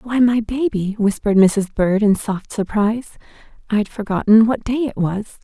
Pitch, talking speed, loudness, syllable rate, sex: 215 Hz, 175 wpm, -18 LUFS, 5.1 syllables/s, female